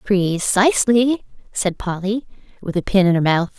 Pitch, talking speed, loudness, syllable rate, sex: 200 Hz, 165 wpm, -18 LUFS, 4.5 syllables/s, female